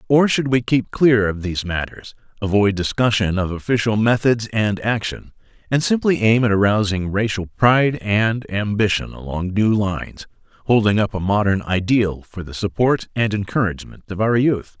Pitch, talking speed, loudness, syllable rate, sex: 105 Hz, 160 wpm, -19 LUFS, 4.9 syllables/s, male